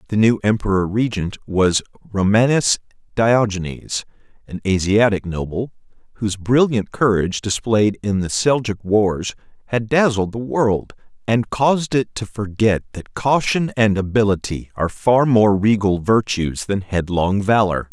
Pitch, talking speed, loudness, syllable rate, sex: 105 Hz, 130 wpm, -18 LUFS, 4.4 syllables/s, male